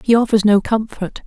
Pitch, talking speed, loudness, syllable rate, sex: 215 Hz, 190 wpm, -16 LUFS, 5.1 syllables/s, female